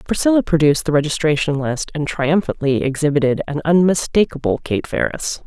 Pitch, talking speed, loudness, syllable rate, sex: 155 Hz, 130 wpm, -18 LUFS, 5.7 syllables/s, female